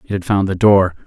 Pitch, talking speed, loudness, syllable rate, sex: 95 Hz, 280 wpm, -15 LUFS, 5.7 syllables/s, male